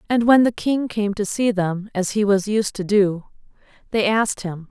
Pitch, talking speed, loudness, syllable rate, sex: 205 Hz, 215 wpm, -20 LUFS, 4.7 syllables/s, female